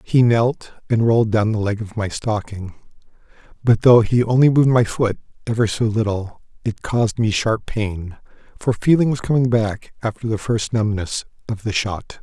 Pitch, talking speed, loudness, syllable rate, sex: 110 Hz, 180 wpm, -19 LUFS, 4.8 syllables/s, male